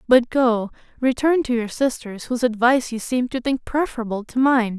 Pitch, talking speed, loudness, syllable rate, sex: 245 Hz, 190 wpm, -21 LUFS, 5.3 syllables/s, female